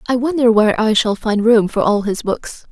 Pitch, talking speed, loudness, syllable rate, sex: 220 Hz, 245 wpm, -15 LUFS, 5.2 syllables/s, female